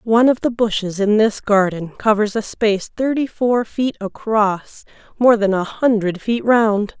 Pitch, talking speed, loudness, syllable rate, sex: 215 Hz, 165 wpm, -17 LUFS, 4.4 syllables/s, female